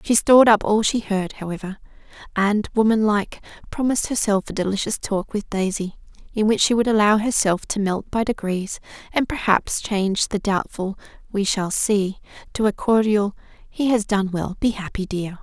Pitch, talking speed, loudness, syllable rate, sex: 205 Hz, 170 wpm, -21 LUFS, 5.1 syllables/s, female